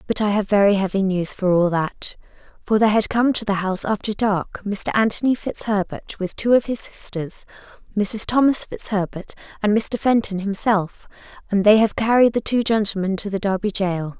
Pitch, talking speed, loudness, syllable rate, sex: 205 Hz, 185 wpm, -20 LUFS, 5.1 syllables/s, female